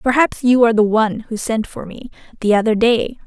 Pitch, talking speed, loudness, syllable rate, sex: 225 Hz, 220 wpm, -16 LUFS, 5.6 syllables/s, female